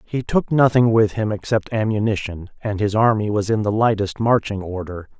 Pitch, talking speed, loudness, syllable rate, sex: 105 Hz, 185 wpm, -19 LUFS, 5.1 syllables/s, male